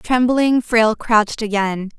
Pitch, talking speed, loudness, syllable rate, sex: 225 Hz, 120 wpm, -17 LUFS, 4.2 syllables/s, female